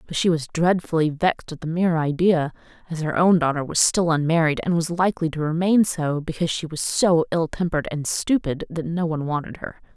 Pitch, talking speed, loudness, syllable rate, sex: 165 Hz, 210 wpm, -22 LUFS, 5.8 syllables/s, female